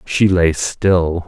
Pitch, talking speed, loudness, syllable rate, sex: 90 Hz, 140 wpm, -15 LUFS, 2.6 syllables/s, male